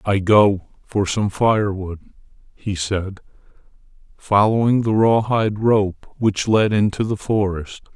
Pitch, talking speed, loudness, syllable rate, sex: 105 Hz, 130 wpm, -19 LUFS, 3.9 syllables/s, male